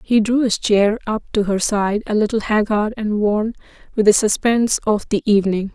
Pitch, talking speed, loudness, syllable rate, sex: 210 Hz, 200 wpm, -18 LUFS, 5.0 syllables/s, female